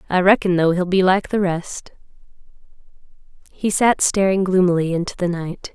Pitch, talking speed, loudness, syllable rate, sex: 185 Hz, 155 wpm, -18 LUFS, 5.1 syllables/s, female